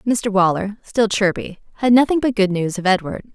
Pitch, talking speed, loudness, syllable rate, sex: 205 Hz, 195 wpm, -18 LUFS, 5.2 syllables/s, female